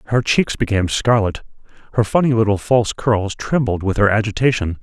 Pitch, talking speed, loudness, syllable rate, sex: 110 Hz, 160 wpm, -17 LUFS, 5.7 syllables/s, male